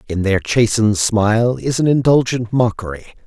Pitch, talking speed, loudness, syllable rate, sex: 115 Hz, 145 wpm, -16 LUFS, 5.2 syllables/s, male